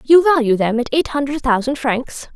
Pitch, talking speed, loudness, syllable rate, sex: 265 Hz, 205 wpm, -17 LUFS, 5.1 syllables/s, female